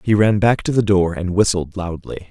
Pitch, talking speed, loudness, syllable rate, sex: 95 Hz, 235 wpm, -17 LUFS, 5.0 syllables/s, male